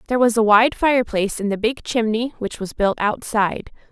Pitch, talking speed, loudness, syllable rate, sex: 225 Hz, 200 wpm, -19 LUFS, 5.8 syllables/s, female